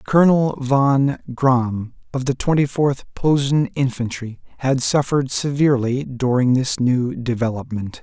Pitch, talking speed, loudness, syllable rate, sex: 130 Hz, 120 wpm, -19 LUFS, 4.3 syllables/s, male